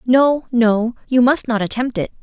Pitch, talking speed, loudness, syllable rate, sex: 240 Hz, 190 wpm, -17 LUFS, 4.3 syllables/s, female